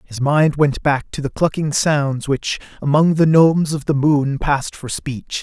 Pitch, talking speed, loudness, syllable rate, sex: 145 Hz, 200 wpm, -17 LUFS, 4.3 syllables/s, male